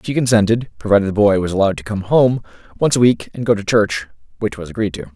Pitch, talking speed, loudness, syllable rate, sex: 105 Hz, 245 wpm, -17 LUFS, 6.8 syllables/s, male